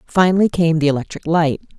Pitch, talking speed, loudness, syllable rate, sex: 165 Hz, 170 wpm, -17 LUFS, 6.0 syllables/s, female